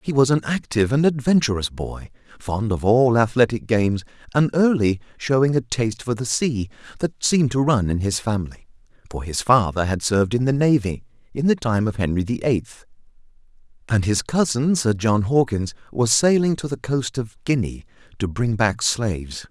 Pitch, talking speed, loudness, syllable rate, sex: 120 Hz, 180 wpm, -21 LUFS, 5.2 syllables/s, male